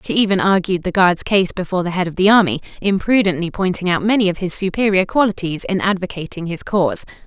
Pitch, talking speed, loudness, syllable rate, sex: 190 Hz, 200 wpm, -17 LUFS, 6.2 syllables/s, female